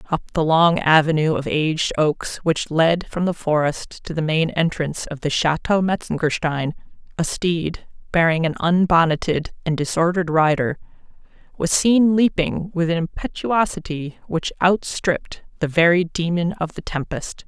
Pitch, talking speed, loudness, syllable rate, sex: 165 Hz, 145 wpm, -20 LUFS, 4.6 syllables/s, female